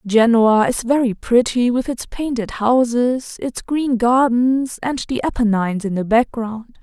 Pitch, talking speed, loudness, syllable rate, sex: 240 Hz, 150 wpm, -18 LUFS, 4.1 syllables/s, female